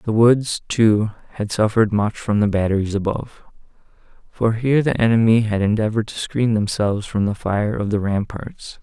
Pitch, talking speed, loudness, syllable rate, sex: 110 Hz, 170 wpm, -19 LUFS, 5.2 syllables/s, male